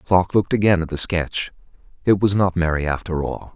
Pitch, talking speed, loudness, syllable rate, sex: 90 Hz, 205 wpm, -20 LUFS, 5.7 syllables/s, male